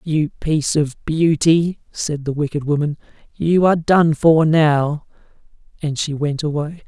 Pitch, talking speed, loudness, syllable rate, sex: 155 Hz, 150 wpm, -18 LUFS, 4.2 syllables/s, male